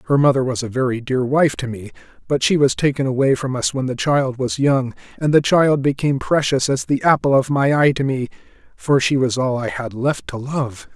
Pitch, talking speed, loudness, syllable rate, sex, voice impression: 130 Hz, 235 wpm, -18 LUFS, 5.3 syllables/s, male, very masculine, old, very thick, slightly tensed, slightly powerful, bright, slightly hard, slightly muffled, fluent, slightly raspy, cool, intellectual, very sincere, very calm, very mature, very friendly, reassuring, unique, slightly elegant, wild, lively, kind, slightly intense